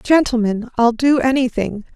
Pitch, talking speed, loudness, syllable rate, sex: 245 Hz, 125 wpm, -17 LUFS, 4.5 syllables/s, female